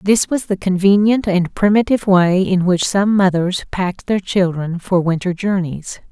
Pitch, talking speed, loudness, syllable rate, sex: 190 Hz, 165 wpm, -16 LUFS, 4.6 syllables/s, female